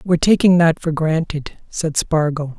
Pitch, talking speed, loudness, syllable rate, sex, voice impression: 160 Hz, 160 wpm, -17 LUFS, 4.5 syllables/s, male, masculine, very adult-like, middle-aged, slightly thick, relaxed, slightly weak, slightly dark, slightly soft, slightly muffled, slightly halting, slightly cool, intellectual, refreshing, very sincere, calm, slightly friendly, slightly reassuring, very unique, elegant, sweet, kind, very modest